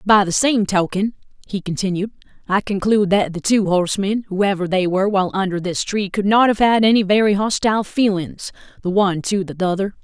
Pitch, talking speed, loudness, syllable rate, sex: 195 Hz, 190 wpm, -18 LUFS, 5.6 syllables/s, female